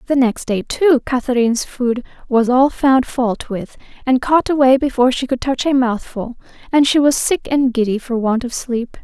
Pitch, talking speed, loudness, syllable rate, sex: 255 Hz, 200 wpm, -16 LUFS, 4.8 syllables/s, female